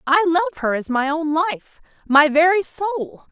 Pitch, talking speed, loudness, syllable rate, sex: 315 Hz, 165 wpm, -18 LUFS, 4.2 syllables/s, female